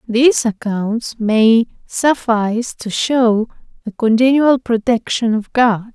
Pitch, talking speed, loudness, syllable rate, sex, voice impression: 230 Hz, 110 wpm, -15 LUFS, 3.7 syllables/s, female, feminine, adult-like, slightly soft, halting, calm, slightly elegant, kind